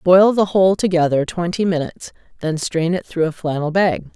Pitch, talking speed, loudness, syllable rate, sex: 175 Hz, 190 wpm, -18 LUFS, 5.3 syllables/s, female